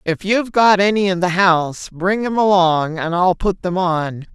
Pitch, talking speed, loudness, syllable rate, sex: 185 Hz, 205 wpm, -16 LUFS, 4.6 syllables/s, female